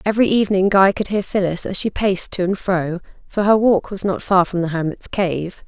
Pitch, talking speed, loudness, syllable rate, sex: 190 Hz, 235 wpm, -18 LUFS, 5.5 syllables/s, female